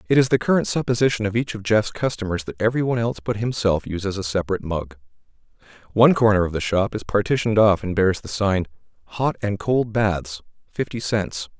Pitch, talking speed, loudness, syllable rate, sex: 105 Hz, 190 wpm, -21 LUFS, 6.1 syllables/s, male